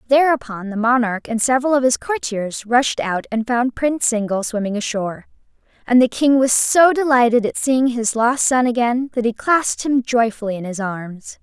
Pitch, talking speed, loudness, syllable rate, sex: 240 Hz, 190 wpm, -18 LUFS, 5.0 syllables/s, female